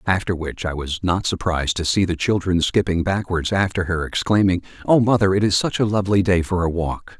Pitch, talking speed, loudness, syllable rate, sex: 90 Hz, 215 wpm, -20 LUFS, 5.6 syllables/s, male